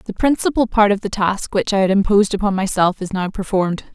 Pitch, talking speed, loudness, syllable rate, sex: 200 Hz, 230 wpm, -18 LUFS, 6.2 syllables/s, female